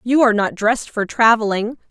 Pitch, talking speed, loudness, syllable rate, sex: 225 Hz, 190 wpm, -17 LUFS, 5.9 syllables/s, female